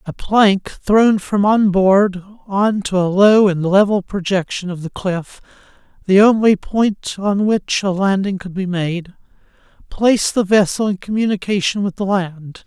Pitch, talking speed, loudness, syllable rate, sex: 195 Hz, 160 wpm, -16 LUFS, 4.2 syllables/s, male